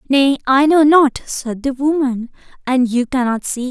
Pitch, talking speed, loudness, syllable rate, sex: 265 Hz, 180 wpm, -15 LUFS, 4.3 syllables/s, female